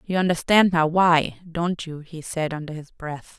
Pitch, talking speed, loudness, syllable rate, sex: 165 Hz, 175 wpm, -21 LUFS, 4.3 syllables/s, female